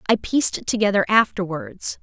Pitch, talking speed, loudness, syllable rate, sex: 205 Hz, 150 wpm, -20 LUFS, 5.5 syllables/s, female